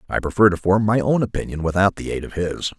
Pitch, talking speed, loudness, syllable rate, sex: 95 Hz, 260 wpm, -20 LUFS, 6.4 syllables/s, male